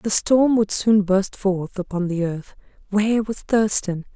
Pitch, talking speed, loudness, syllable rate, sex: 200 Hz, 175 wpm, -20 LUFS, 4.0 syllables/s, female